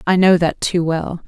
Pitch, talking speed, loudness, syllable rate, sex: 170 Hz, 235 wpm, -16 LUFS, 4.5 syllables/s, female